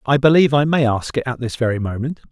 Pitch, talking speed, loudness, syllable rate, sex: 130 Hz, 260 wpm, -18 LUFS, 6.6 syllables/s, male